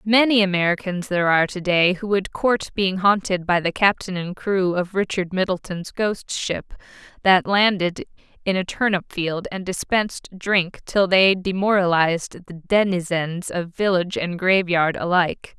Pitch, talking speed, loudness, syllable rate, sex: 185 Hz, 155 wpm, -20 LUFS, 4.6 syllables/s, female